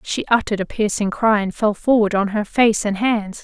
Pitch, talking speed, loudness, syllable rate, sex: 210 Hz, 225 wpm, -18 LUFS, 5.1 syllables/s, female